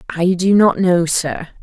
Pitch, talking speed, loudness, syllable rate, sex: 180 Hz, 185 wpm, -15 LUFS, 3.9 syllables/s, female